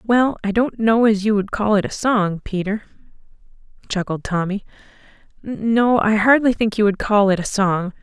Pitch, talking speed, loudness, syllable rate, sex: 210 Hz, 180 wpm, -18 LUFS, 4.7 syllables/s, female